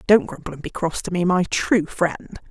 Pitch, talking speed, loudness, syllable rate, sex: 180 Hz, 240 wpm, -21 LUFS, 4.9 syllables/s, female